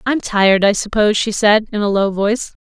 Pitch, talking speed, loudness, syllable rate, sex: 210 Hz, 230 wpm, -15 LUFS, 5.9 syllables/s, female